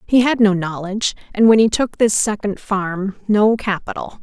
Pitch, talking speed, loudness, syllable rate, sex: 210 Hz, 185 wpm, -17 LUFS, 4.8 syllables/s, female